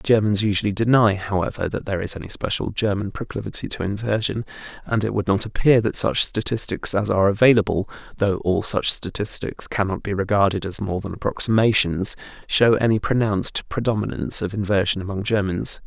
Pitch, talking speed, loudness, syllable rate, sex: 105 Hz, 165 wpm, -21 LUFS, 4.6 syllables/s, male